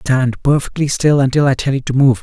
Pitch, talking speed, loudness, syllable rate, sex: 130 Hz, 245 wpm, -15 LUFS, 5.5 syllables/s, male